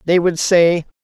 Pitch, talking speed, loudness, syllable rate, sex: 170 Hz, 175 wpm, -15 LUFS, 4.0 syllables/s, female